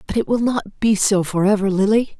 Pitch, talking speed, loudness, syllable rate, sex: 205 Hz, 245 wpm, -18 LUFS, 5.4 syllables/s, female